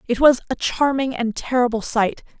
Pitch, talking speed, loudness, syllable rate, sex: 245 Hz, 175 wpm, -20 LUFS, 5.0 syllables/s, female